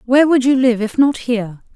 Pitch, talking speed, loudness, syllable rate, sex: 245 Hz, 240 wpm, -15 LUFS, 5.9 syllables/s, female